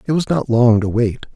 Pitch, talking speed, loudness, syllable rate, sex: 125 Hz, 265 wpm, -16 LUFS, 5.4 syllables/s, male